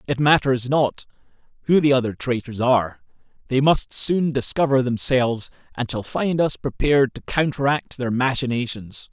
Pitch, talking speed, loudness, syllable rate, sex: 130 Hz, 145 wpm, -21 LUFS, 4.8 syllables/s, male